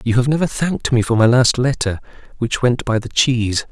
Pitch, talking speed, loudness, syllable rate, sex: 120 Hz, 225 wpm, -17 LUFS, 5.6 syllables/s, male